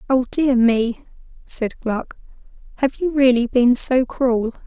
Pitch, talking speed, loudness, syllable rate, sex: 250 Hz, 140 wpm, -18 LUFS, 3.6 syllables/s, female